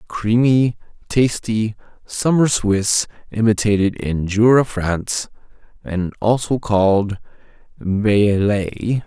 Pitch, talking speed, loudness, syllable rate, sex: 110 Hz, 80 wpm, -18 LUFS, 3.5 syllables/s, male